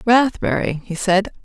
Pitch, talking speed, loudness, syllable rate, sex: 205 Hz, 125 wpm, -19 LUFS, 4.3 syllables/s, female